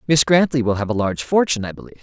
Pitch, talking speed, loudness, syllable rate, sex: 130 Hz, 265 wpm, -18 LUFS, 8.2 syllables/s, male